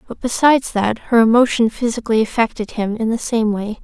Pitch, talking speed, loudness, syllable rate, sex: 225 Hz, 190 wpm, -17 LUFS, 5.7 syllables/s, female